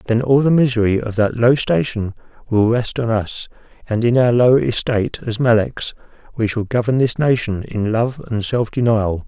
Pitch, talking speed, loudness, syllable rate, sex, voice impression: 115 Hz, 190 wpm, -17 LUFS, 4.8 syllables/s, male, masculine, adult-like, tensed, slightly weak, soft, slightly muffled, slightly raspy, intellectual, calm, mature, slightly friendly, reassuring, wild, lively, slightly kind, slightly modest